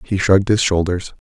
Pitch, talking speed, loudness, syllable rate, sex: 95 Hz, 190 wpm, -17 LUFS, 5.7 syllables/s, male